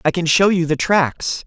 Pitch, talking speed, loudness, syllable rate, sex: 170 Hz, 245 wpm, -17 LUFS, 4.4 syllables/s, male